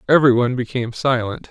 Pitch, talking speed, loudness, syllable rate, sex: 125 Hz, 120 wpm, -18 LUFS, 6.8 syllables/s, male